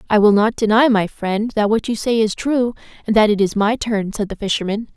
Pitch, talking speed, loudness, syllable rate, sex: 215 Hz, 255 wpm, -17 LUFS, 5.4 syllables/s, female